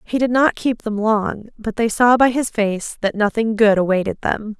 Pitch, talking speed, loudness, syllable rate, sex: 220 Hz, 220 wpm, -18 LUFS, 4.7 syllables/s, female